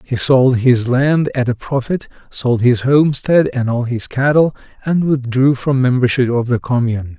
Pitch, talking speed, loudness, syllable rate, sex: 125 Hz, 175 wpm, -15 LUFS, 4.6 syllables/s, male